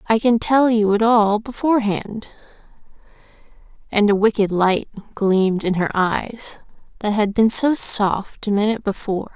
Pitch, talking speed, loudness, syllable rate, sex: 215 Hz, 150 wpm, -18 LUFS, 4.6 syllables/s, female